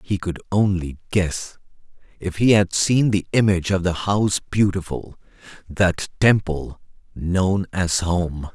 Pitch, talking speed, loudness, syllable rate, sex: 90 Hz, 135 wpm, -21 LUFS, 4.0 syllables/s, male